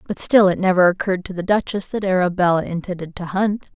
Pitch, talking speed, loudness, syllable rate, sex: 185 Hz, 205 wpm, -19 LUFS, 6.2 syllables/s, female